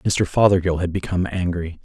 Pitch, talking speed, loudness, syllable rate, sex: 90 Hz, 165 wpm, -20 LUFS, 5.6 syllables/s, male